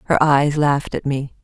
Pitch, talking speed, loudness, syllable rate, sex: 140 Hz, 210 wpm, -18 LUFS, 5.2 syllables/s, female